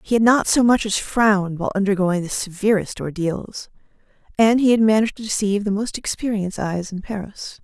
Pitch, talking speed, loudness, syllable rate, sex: 205 Hz, 190 wpm, -20 LUFS, 5.7 syllables/s, female